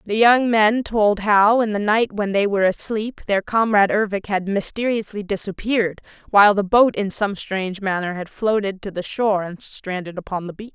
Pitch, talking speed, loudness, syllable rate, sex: 205 Hz, 195 wpm, -19 LUFS, 5.2 syllables/s, female